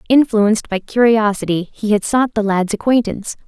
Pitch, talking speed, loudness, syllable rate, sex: 215 Hz, 155 wpm, -16 LUFS, 5.3 syllables/s, female